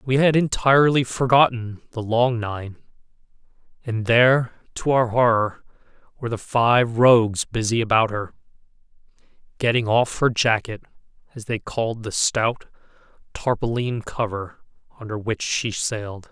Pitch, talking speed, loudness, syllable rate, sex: 115 Hz, 125 wpm, -21 LUFS, 4.6 syllables/s, male